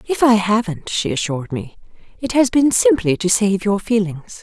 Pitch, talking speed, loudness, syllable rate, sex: 205 Hz, 190 wpm, -17 LUFS, 4.9 syllables/s, female